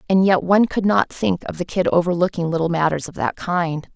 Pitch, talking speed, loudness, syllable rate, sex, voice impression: 175 Hz, 230 wpm, -19 LUFS, 5.6 syllables/s, female, very feminine, adult-like, slightly intellectual, slightly sweet